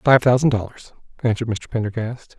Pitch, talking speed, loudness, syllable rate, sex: 115 Hz, 150 wpm, -20 LUFS, 5.9 syllables/s, male